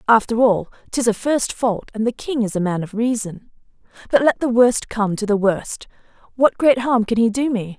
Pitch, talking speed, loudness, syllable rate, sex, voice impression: 225 Hz, 225 wpm, -19 LUFS, 5.0 syllables/s, female, gender-neutral, slightly dark, soft, calm, reassuring, sweet, slightly kind